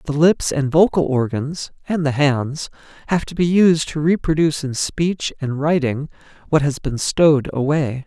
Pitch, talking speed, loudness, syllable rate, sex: 150 Hz, 170 wpm, -18 LUFS, 4.5 syllables/s, male